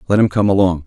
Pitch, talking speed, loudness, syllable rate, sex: 95 Hz, 275 wpm, -15 LUFS, 7.3 syllables/s, male